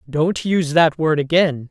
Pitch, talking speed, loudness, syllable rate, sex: 160 Hz, 175 wpm, -17 LUFS, 4.5 syllables/s, female